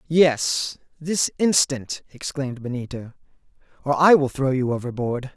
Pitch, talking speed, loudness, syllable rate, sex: 140 Hz, 125 wpm, -22 LUFS, 4.3 syllables/s, male